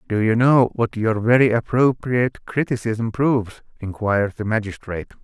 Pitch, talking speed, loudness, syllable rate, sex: 115 Hz, 135 wpm, -20 LUFS, 5.1 syllables/s, male